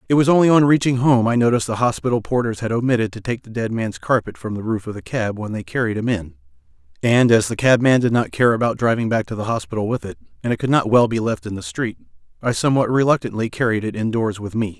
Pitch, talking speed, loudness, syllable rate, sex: 115 Hz, 255 wpm, -19 LUFS, 6.5 syllables/s, male